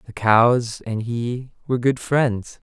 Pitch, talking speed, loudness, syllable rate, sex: 120 Hz, 155 wpm, -20 LUFS, 3.5 syllables/s, male